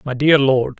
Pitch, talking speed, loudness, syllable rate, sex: 135 Hz, 225 wpm, -15 LUFS, 4.6 syllables/s, male